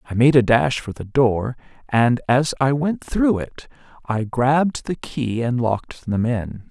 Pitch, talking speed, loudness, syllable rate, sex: 125 Hz, 190 wpm, -20 LUFS, 4.0 syllables/s, male